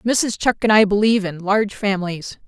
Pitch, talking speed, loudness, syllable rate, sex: 205 Hz, 195 wpm, -18 LUFS, 5.6 syllables/s, female